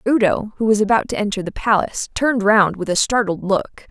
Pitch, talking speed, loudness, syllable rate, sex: 205 Hz, 215 wpm, -18 LUFS, 5.7 syllables/s, female